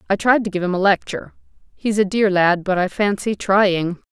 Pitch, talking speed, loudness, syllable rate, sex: 195 Hz, 220 wpm, -18 LUFS, 5.2 syllables/s, female